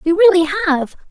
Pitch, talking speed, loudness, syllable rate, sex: 350 Hz, 160 wpm, -14 LUFS, 6.0 syllables/s, female